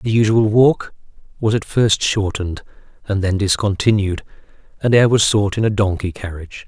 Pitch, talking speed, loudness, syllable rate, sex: 100 Hz, 160 wpm, -17 LUFS, 5.1 syllables/s, male